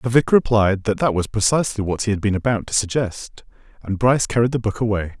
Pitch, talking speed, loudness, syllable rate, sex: 110 Hz, 230 wpm, -19 LUFS, 6.3 syllables/s, male